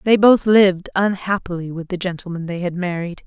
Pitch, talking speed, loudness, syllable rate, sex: 185 Hz, 185 wpm, -18 LUFS, 5.5 syllables/s, female